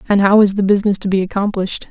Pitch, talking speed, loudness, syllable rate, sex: 200 Hz, 250 wpm, -15 LUFS, 7.6 syllables/s, female